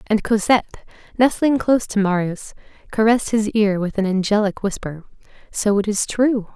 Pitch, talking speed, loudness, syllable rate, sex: 210 Hz, 155 wpm, -19 LUFS, 5.5 syllables/s, female